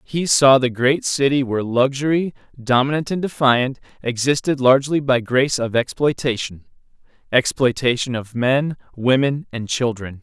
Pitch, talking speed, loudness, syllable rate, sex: 130 Hz, 130 wpm, -19 LUFS, 5.4 syllables/s, male